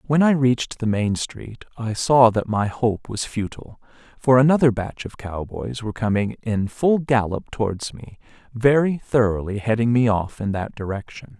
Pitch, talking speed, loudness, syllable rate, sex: 115 Hz, 175 wpm, -21 LUFS, 4.7 syllables/s, male